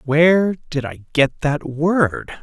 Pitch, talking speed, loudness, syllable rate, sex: 150 Hz, 150 wpm, -18 LUFS, 3.2 syllables/s, male